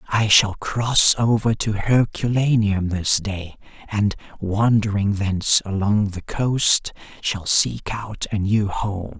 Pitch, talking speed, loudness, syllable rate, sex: 105 Hz, 130 wpm, -20 LUFS, 3.5 syllables/s, male